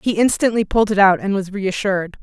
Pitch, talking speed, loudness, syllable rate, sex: 200 Hz, 215 wpm, -17 LUFS, 6.2 syllables/s, female